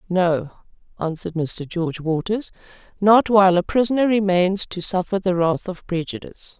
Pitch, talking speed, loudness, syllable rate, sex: 185 Hz, 145 wpm, -20 LUFS, 5.1 syllables/s, female